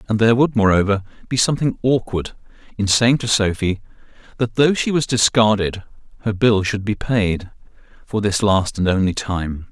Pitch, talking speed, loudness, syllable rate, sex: 105 Hz, 160 wpm, -18 LUFS, 5.1 syllables/s, male